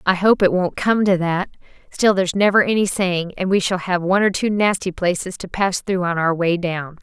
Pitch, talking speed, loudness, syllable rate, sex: 185 Hz, 240 wpm, -18 LUFS, 5.3 syllables/s, female